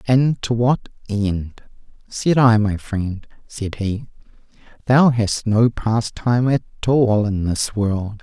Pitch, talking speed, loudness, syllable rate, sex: 110 Hz, 140 wpm, -19 LUFS, 3.3 syllables/s, male